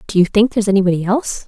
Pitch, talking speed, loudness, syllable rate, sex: 205 Hz, 285 wpm, -15 LUFS, 8.3 syllables/s, female